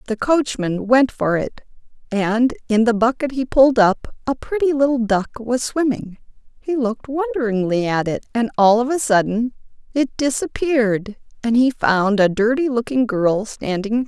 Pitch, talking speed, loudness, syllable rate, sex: 235 Hz, 170 wpm, -19 LUFS, 4.8 syllables/s, female